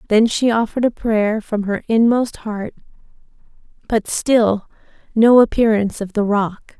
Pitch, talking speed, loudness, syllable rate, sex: 220 Hz, 140 wpm, -17 LUFS, 4.4 syllables/s, female